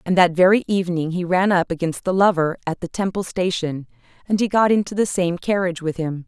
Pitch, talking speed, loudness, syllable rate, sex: 180 Hz, 220 wpm, -20 LUFS, 5.8 syllables/s, female